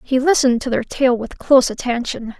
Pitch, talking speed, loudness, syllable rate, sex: 250 Hz, 200 wpm, -17 LUFS, 5.7 syllables/s, female